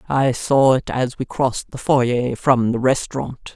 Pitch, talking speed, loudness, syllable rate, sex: 130 Hz, 185 wpm, -19 LUFS, 4.2 syllables/s, female